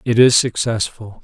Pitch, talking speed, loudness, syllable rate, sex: 115 Hz, 145 wpm, -16 LUFS, 4.5 syllables/s, male